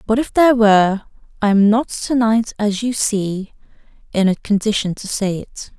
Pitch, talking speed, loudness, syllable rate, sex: 215 Hz, 185 wpm, -17 LUFS, 4.8 syllables/s, female